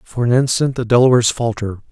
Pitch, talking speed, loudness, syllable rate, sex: 120 Hz, 190 wpm, -15 LUFS, 6.9 syllables/s, male